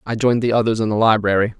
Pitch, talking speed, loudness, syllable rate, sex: 110 Hz, 265 wpm, -17 LUFS, 7.6 syllables/s, male